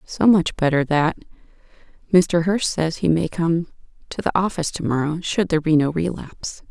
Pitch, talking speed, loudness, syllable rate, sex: 165 Hz, 180 wpm, -20 LUFS, 5.2 syllables/s, female